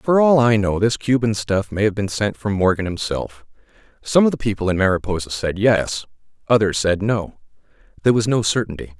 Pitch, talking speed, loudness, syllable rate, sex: 105 Hz, 195 wpm, -19 LUFS, 5.5 syllables/s, male